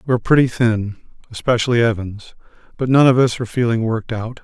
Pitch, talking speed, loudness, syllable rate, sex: 115 Hz, 190 wpm, -17 LUFS, 6.6 syllables/s, male